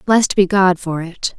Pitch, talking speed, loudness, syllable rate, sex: 185 Hz, 215 wpm, -16 LUFS, 4.8 syllables/s, female